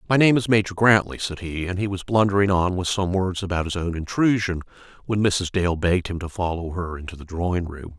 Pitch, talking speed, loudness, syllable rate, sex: 95 Hz, 235 wpm, -22 LUFS, 5.8 syllables/s, male